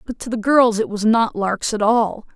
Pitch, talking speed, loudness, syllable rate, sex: 220 Hz, 255 wpm, -18 LUFS, 4.7 syllables/s, female